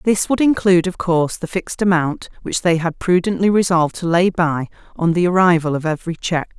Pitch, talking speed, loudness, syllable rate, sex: 175 Hz, 200 wpm, -17 LUFS, 5.9 syllables/s, female